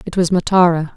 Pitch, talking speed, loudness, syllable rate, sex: 175 Hz, 190 wpm, -15 LUFS, 6.0 syllables/s, female